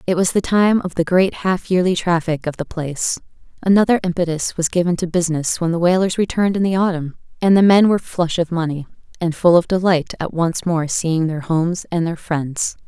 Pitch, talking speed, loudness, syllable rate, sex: 175 Hz, 215 wpm, -18 LUFS, 5.6 syllables/s, female